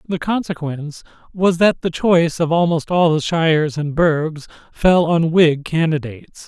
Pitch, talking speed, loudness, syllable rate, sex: 165 Hz, 160 wpm, -17 LUFS, 4.5 syllables/s, male